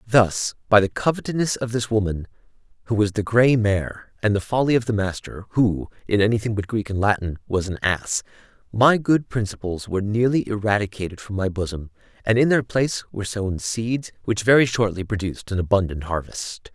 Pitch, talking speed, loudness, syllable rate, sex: 105 Hz, 185 wpm, -22 LUFS, 5.5 syllables/s, male